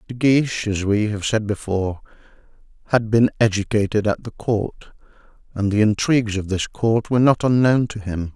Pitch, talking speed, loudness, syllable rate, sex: 110 Hz, 170 wpm, -20 LUFS, 5.1 syllables/s, male